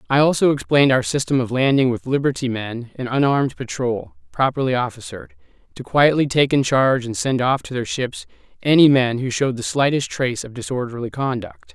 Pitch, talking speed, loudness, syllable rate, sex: 130 Hz, 185 wpm, -19 LUFS, 5.7 syllables/s, male